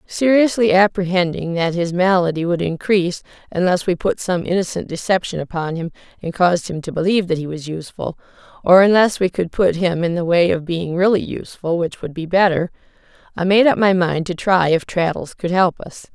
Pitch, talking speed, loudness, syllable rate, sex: 180 Hz, 195 wpm, -18 LUFS, 5.4 syllables/s, female